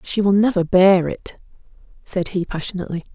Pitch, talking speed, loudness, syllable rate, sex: 190 Hz, 155 wpm, -19 LUFS, 5.6 syllables/s, female